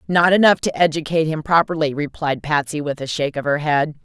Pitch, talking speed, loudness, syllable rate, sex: 155 Hz, 210 wpm, -19 LUFS, 6.0 syllables/s, female